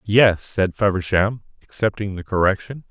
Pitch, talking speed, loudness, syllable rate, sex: 100 Hz, 125 wpm, -20 LUFS, 4.8 syllables/s, male